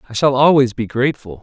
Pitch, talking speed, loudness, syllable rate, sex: 130 Hz, 210 wpm, -15 LUFS, 6.4 syllables/s, male